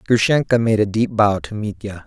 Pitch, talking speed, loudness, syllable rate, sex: 105 Hz, 205 wpm, -18 LUFS, 5.2 syllables/s, male